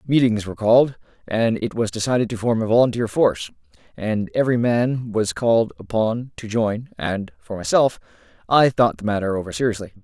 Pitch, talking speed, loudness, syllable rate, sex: 110 Hz, 175 wpm, -20 LUFS, 5.5 syllables/s, male